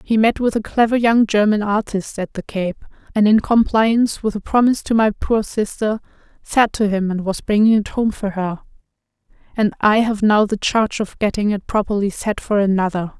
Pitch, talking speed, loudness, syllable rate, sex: 210 Hz, 200 wpm, -18 LUFS, 5.2 syllables/s, female